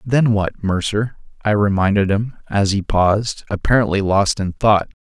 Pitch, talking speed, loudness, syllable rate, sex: 100 Hz, 165 wpm, -18 LUFS, 4.8 syllables/s, male